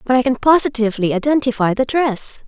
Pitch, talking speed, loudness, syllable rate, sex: 245 Hz, 170 wpm, -16 LUFS, 5.9 syllables/s, female